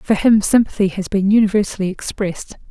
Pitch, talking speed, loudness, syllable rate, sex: 200 Hz, 155 wpm, -17 LUFS, 5.8 syllables/s, female